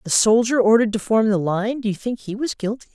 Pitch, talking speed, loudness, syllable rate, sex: 220 Hz, 245 wpm, -20 LUFS, 6.1 syllables/s, female